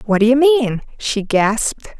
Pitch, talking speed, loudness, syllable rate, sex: 240 Hz, 180 wpm, -16 LUFS, 4.4 syllables/s, female